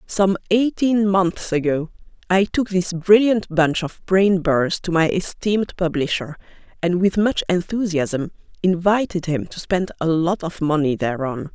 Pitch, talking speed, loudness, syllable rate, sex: 180 Hz, 150 wpm, -20 LUFS, 4.2 syllables/s, female